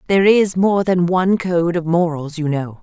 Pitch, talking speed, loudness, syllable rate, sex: 175 Hz, 210 wpm, -17 LUFS, 4.9 syllables/s, female